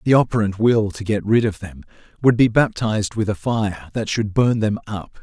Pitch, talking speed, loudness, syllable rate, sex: 105 Hz, 220 wpm, -19 LUFS, 5.0 syllables/s, male